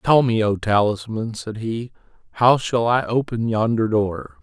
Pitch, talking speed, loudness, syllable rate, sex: 115 Hz, 165 wpm, -20 LUFS, 4.2 syllables/s, male